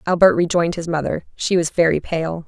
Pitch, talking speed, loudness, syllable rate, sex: 165 Hz, 195 wpm, -19 LUFS, 5.8 syllables/s, female